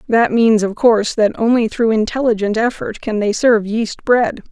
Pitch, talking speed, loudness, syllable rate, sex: 225 Hz, 185 wpm, -15 LUFS, 4.9 syllables/s, female